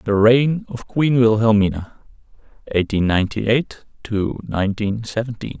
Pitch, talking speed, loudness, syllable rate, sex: 110 Hz, 120 wpm, -19 LUFS, 4.6 syllables/s, male